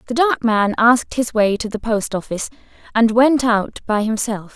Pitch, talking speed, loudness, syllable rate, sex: 225 Hz, 195 wpm, -18 LUFS, 4.9 syllables/s, female